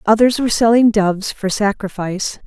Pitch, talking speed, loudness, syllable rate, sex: 210 Hz, 145 wpm, -16 LUFS, 5.7 syllables/s, female